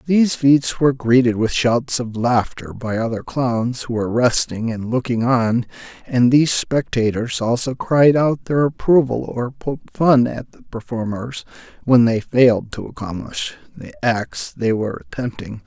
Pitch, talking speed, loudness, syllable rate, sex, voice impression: 120 Hz, 155 wpm, -18 LUFS, 4.5 syllables/s, male, masculine, very adult-like, slightly thick, cool, slightly sincere, slightly sweet